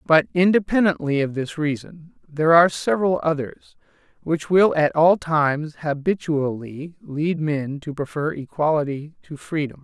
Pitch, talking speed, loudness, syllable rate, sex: 155 Hz, 135 wpm, -21 LUFS, 4.5 syllables/s, male